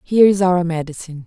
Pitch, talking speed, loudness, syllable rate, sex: 175 Hz, 190 wpm, -16 LUFS, 6.8 syllables/s, female